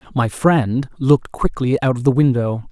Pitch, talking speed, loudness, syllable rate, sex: 130 Hz, 175 wpm, -17 LUFS, 4.9 syllables/s, male